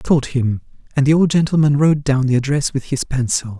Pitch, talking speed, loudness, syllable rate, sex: 140 Hz, 235 wpm, -17 LUFS, 5.9 syllables/s, male